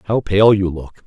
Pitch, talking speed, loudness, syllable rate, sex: 100 Hz, 225 wpm, -15 LUFS, 4.5 syllables/s, male